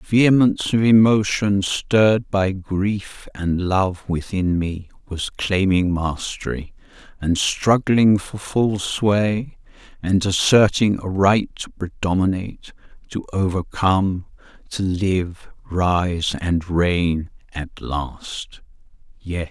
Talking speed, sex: 115 wpm, male